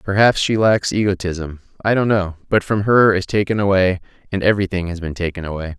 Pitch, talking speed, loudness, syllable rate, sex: 95 Hz, 195 wpm, -18 LUFS, 5.8 syllables/s, male